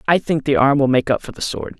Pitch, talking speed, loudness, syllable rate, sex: 145 Hz, 335 wpm, -18 LUFS, 6.2 syllables/s, male